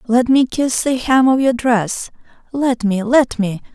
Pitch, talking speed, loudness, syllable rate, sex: 245 Hz, 190 wpm, -16 LUFS, 3.9 syllables/s, female